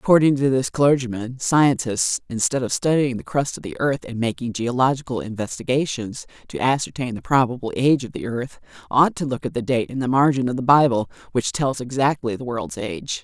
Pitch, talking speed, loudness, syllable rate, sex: 130 Hz, 195 wpm, -21 LUFS, 5.5 syllables/s, female